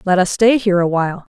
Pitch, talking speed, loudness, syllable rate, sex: 190 Hz, 220 wpm, -15 LUFS, 6.8 syllables/s, female